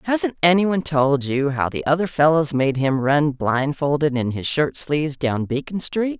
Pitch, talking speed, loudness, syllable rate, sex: 150 Hz, 185 wpm, -20 LUFS, 4.5 syllables/s, female